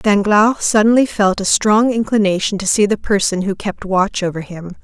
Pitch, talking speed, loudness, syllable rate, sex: 205 Hz, 185 wpm, -15 LUFS, 4.9 syllables/s, female